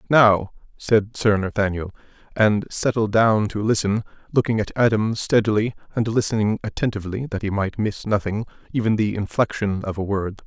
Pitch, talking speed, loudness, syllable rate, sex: 105 Hz, 150 wpm, -21 LUFS, 5.2 syllables/s, male